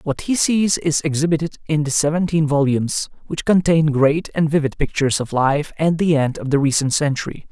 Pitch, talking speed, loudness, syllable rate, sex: 150 Hz, 190 wpm, -18 LUFS, 5.4 syllables/s, male